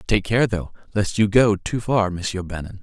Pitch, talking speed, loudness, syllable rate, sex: 100 Hz, 215 wpm, -21 LUFS, 4.9 syllables/s, male